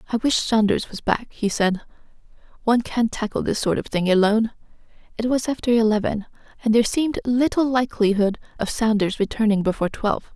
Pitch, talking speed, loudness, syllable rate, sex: 220 Hz, 170 wpm, -21 LUFS, 6.1 syllables/s, female